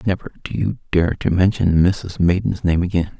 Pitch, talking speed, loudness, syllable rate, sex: 90 Hz, 190 wpm, -19 LUFS, 5.0 syllables/s, male